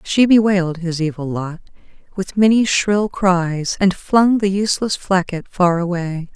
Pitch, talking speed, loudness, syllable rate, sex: 185 Hz, 150 wpm, -17 LUFS, 4.3 syllables/s, female